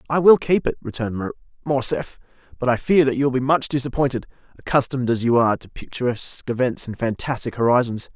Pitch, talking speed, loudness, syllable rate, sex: 125 Hz, 185 wpm, -21 LUFS, 6.3 syllables/s, male